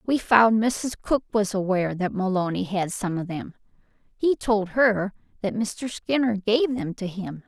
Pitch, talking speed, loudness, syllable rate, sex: 210 Hz, 170 wpm, -24 LUFS, 4.3 syllables/s, female